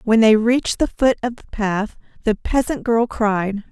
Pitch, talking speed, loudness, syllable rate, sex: 225 Hz, 195 wpm, -19 LUFS, 4.4 syllables/s, female